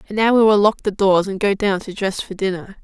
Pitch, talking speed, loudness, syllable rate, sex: 200 Hz, 295 wpm, -18 LUFS, 6.0 syllables/s, female